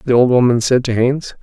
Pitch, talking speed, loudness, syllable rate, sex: 125 Hz, 250 wpm, -14 LUFS, 6.2 syllables/s, male